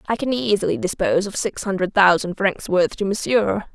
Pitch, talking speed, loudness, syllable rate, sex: 195 Hz, 190 wpm, -20 LUFS, 5.4 syllables/s, female